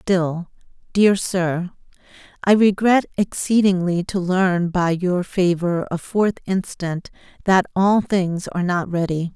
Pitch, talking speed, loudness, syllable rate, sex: 185 Hz, 120 wpm, -20 LUFS, 3.8 syllables/s, female